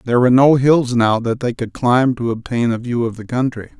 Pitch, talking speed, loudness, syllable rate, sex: 120 Hz, 255 wpm, -16 LUFS, 5.5 syllables/s, male